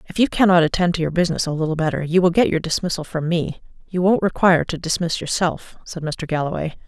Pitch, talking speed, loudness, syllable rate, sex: 170 Hz, 225 wpm, -20 LUFS, 6.4 syllables/s, female